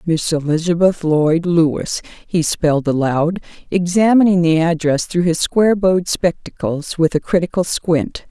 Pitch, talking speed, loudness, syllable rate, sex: 170 Hz, 135 wpm, -16 LUFS, 4.5 syllables/s, female